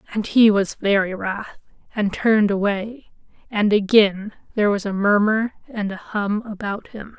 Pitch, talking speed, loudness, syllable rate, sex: 205 Hz, 160 wpm, -20 LUFS, 4.5 syllables/s, female